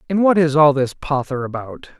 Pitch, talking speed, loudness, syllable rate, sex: 145 Hz, 210 wpm, -17 LUFS, 5.2 syllables/s, male